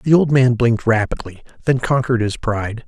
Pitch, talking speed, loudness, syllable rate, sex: 120 Hz, 190 wpm, -17 LUFS, 5.8 syllables/s, male